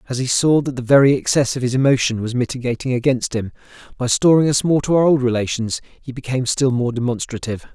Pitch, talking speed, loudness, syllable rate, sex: 125 Hz, 210 wpm, -18 LUFS, 6.4 syllables/s, male